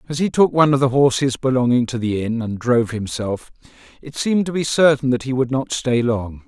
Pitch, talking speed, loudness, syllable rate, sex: 125 Hz, 230 wpm, -19 LUFS, 5.7 syllables/s, male